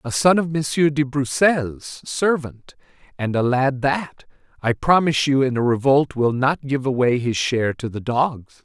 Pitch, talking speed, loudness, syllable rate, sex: 135 Hz, 180 wpm, -20 LUFS, 4.4 syllables/s, male